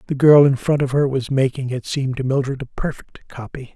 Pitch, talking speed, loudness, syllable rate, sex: 135 Hz, 240 wpm, -18 LUFS, 5.6 syllables/s, male